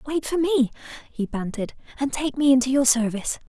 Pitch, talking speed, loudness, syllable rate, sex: 265 Hz, 185 wpm, -23 LUFS, 6.0 syllables/s, female